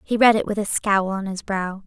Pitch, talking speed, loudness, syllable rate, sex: 200 Hz, 290 wpm, -21 LUFS, 5.1 syllables/s, female